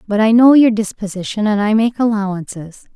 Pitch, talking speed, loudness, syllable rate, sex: 210 Hz, 185 wpm, -14 LUFS, 5.5 syllables/s, female